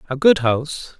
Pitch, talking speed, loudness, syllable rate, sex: 145 Hz, 180 wpm, -17 LUFS, 5.1 syllables/s, male